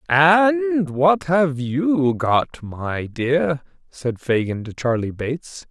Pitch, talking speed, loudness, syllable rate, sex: 145 Hz, 125 wpm, -20 LUFS, 2.9 syllables/s, male